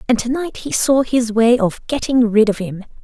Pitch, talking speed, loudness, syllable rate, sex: 235 Hz, 215 wpm, -16 LUFS, 4.9 syllables/s, female